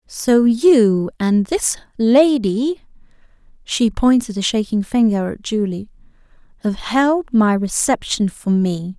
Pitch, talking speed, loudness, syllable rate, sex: 230 Hz, 105 wpm, -17 LUFS, 3.6 syllables/s, female